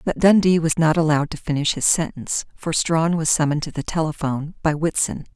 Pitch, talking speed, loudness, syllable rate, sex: 155 Hz, 200 wpm, -20 LUFS, 6.0 syllables/s, female